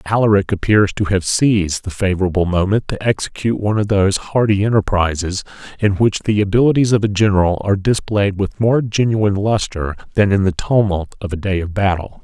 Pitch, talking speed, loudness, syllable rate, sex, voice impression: 100 Hz, 180 wpm, -17 LUFS, 5.7 syllables/s, male, very masculine, very middle-aged, very thick, slightly relaxed, very powerful, bright, very soft, very muffled, fluent, raspy, very cool, intellectual, slightly refreshing, sincere, very calm, very mature, very friendly, reassuring, very unique, slightly elegant, wild, sweet, lively, kind, modest